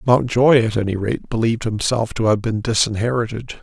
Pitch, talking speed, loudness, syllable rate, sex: 115 Hz, 165 wpm, -19 LUFS, 5.6 syllables/s, male